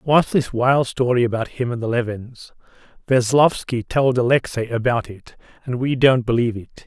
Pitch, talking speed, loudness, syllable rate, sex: 125 Hz, 165 wpm, -19 LUFS, 4.9 syllables/s, male